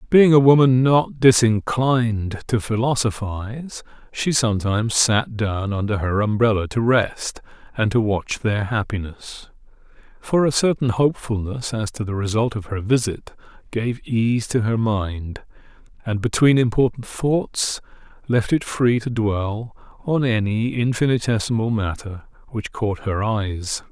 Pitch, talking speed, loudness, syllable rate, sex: 115 Hz, 135 wpm, -20 LUFS, 4.2 syllables/s, male